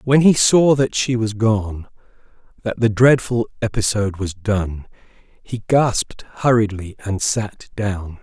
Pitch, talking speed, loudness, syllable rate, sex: 110 Hz, 140 wpm, -18 LUFS, 3.9 syllables/s, male